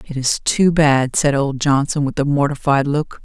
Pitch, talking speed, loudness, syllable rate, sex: 140 Hz, 205 wpm, -17 LUFS, 4.5 syllables/s, female